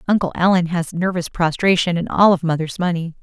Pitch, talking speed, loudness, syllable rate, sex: 175 Hz, 185 wpm, -18 LUFS, 5.7 syllables/s, female